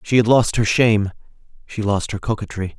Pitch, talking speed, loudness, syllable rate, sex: 105 Hz, 195 wpm, -19 LUFS, 5.5 syllables/s, male